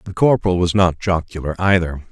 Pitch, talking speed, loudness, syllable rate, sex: 90 Hz, 170 wpm, -18 LUFS, 5.9 syllables/s, male